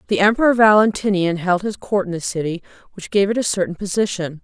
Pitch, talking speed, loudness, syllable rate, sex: 195 Hz, 205 wpm, -18 LUFS, 6.1 syllables/s, female